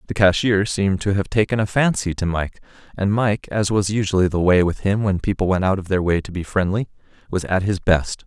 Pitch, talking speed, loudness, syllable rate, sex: 95 Hz, 240 wpm, -20 LUFS, 5.6 syllables/s, male